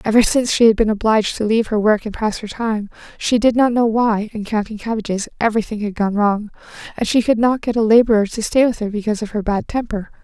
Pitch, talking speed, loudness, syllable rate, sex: 220 Hz, 245 wpm, -18 LUFS, 6.3 syllables/s, female